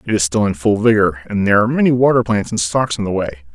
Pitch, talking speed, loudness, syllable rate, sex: 105 Hz, 285 wpm, -16 LUFS, 7.0 syllables/s, male